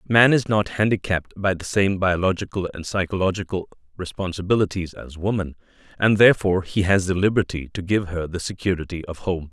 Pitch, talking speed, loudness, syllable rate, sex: 95 Hz, 165 wpm, -22 LUFS, 5.9 syllables/s, male